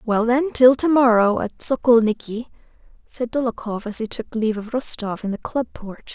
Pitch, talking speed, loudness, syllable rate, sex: 235 Hz, 175 wpm, -20 LUFS, 5.1 syllables/s, female